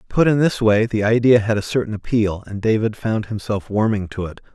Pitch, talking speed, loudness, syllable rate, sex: 110 Hz, 225 wpm, -19 LUFS, 5.5 syllables/s, male